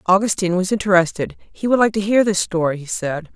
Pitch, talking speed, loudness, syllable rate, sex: 190 Hz, 215 wpm, -18 LUFS, 6.1 syllables/s, female